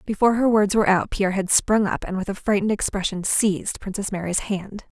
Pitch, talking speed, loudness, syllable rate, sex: 200 Hz, 215 wpm, -22 LUFS, 6.1 syllables/s, female